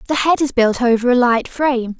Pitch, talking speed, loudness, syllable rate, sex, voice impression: 250 Hz, 240 wpm, -16 LUFS, 5.6 syllables/s, female, feminine, slightly young, tensed, fluent, slightly cute, slightly refreshing, friendly